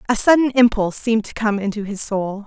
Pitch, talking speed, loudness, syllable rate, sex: 220 Hz, 220 wpm, -18 LUFS, 6.1 syllables/s, female